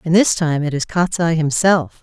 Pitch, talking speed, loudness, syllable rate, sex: 160 Hz, 205 wpm, -17 LUFS, 4.7 syllables/s, female